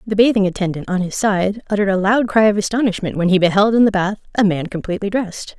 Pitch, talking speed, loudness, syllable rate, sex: 200 Hz, 235 wpm, -17 LUFS, 6.7 syllables/s, female